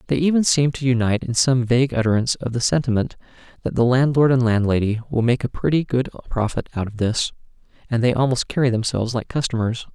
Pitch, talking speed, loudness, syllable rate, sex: 125 Hz, 200 wpm, -20 LUFS, 6.4 syllables/s, male